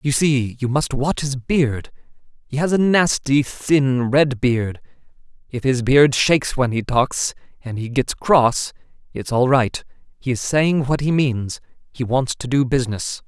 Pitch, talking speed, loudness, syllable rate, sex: 135 Hz, 175 wpm, -19 LUFS, 4.1 syllables/s, male